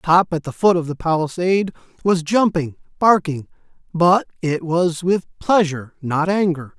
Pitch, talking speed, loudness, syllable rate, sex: 170 Hz, 150 wpm, -19 LUFS, 4.6 syllables/s, male